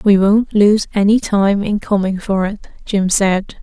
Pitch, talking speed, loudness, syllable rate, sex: 200 Hz, 180 wpm, -15 LUFS, 3.9 syllables/s, female